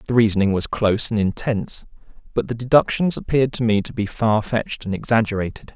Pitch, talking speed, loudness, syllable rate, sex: 110 Hz, 190 wpm, -20 LUFS, 6.3 syllables/s, male